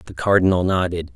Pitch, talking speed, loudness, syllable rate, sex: 90 Hz, 155 wpm, -19 LUFS, 6.1 syllables/s, male